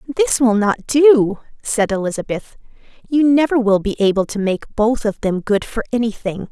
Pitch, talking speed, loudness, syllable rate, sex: 225 Hz, 175 wpm, -17 LUFS, 5.0 syllables/s, female